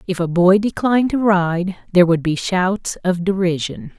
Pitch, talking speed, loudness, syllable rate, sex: 185 Hz, 180 wpm, -17 LUFS, 4.8 syllables/s, female